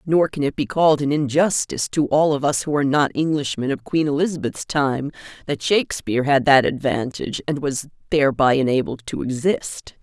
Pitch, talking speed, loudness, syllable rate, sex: 140 Hz, 180 wpm, -20 LUFS, 5.6 syllables/s, female